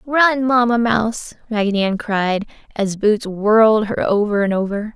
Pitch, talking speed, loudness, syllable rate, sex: 215 Hz, 155 wpm, -17 LUFS, 4.5 syllables/s, female